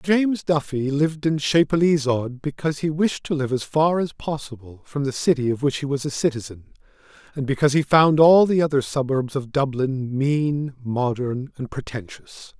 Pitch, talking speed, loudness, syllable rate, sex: 140 Hz, 175 wpm, -21 LUFS, 5.0 syllables/s, male